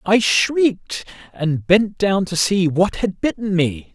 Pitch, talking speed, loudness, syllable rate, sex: 190 Hz, 165 wpm, -18 LUFS, 3.6 syllables/s, male